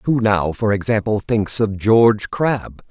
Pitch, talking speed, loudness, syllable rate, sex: 105 Hz, 165 wpm, -18 LUFS, 4.2 syllables/s, male